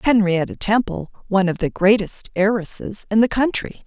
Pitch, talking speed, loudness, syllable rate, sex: 200 Hz, 155 wpm, -19 LUFS, 5.1 syllables/s, female